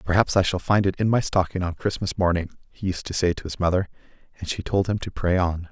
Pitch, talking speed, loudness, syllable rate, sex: 90 Hz, 260 wpm, -24 LUFS, 6.1 syllables/s, male